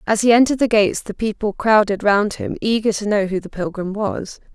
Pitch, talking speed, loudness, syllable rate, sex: 205 Hz, 225 wpm, -18 LUFS, 5.7 syllables/s, female